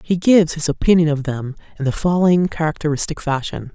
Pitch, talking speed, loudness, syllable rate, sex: 160 Hz, 175 wpm, -18 LUFS, 6.2 syllables/s, female